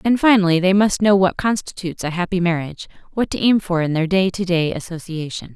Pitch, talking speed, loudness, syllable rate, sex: 180 Hz, 205 wpm, -18 LUFS, 6.0 syllables/s, female